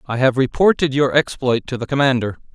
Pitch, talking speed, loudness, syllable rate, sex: 130 Hz, 190 wpm, -18 LUFS, 5.7 syllables/s, male